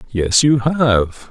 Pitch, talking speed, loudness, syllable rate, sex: 120 Hz, 140 wpm, -15 LUFS, 2.7 syllables/s, male